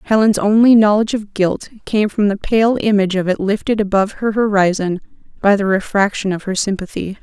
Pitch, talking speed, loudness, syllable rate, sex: 205 Hz, 185 wpm, -16 LUFS, 5.8 syllables/s, female